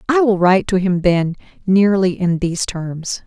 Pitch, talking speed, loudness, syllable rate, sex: 185 Hz, 185 wpm, -16 LUFS, 4.7 syllables/s, female